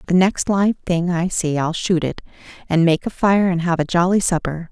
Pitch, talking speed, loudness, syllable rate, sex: 175 Hz, 230 wpm, -18 LUFS, 4.9 syllables/s, female